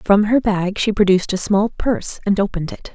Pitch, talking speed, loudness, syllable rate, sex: 200 Hz, 225 wpm, -18 LUFS, 5.9 syllables/s, female